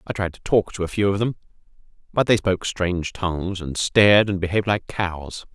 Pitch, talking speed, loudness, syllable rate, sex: 95 Hz, 215 wpm, -21 LUFS, 5.7 syllables/s, male